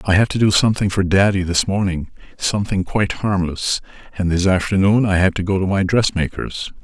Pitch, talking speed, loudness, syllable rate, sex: 95 Hz, 185 wpm, -18 LUFS, 5.7 syllables/s, male